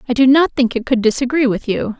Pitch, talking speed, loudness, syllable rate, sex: 250 Hz, 270 wpm, -15 LUFS, 6.1 syllables/s, female